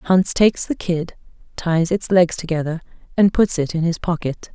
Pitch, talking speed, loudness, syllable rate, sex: 175 Hz, 185 wpm, -19 LUFS, 4.8 syllables/s, female